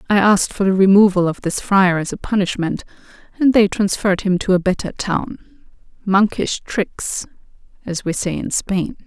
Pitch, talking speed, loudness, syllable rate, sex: 190 Hz, 170 wpm, -17 LUFS, 5.0 syllables/s, female